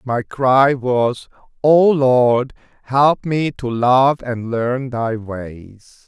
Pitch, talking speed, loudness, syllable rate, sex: 125 Hz, 130 wpm, -16 LUFS, 2.5 syllables/s, male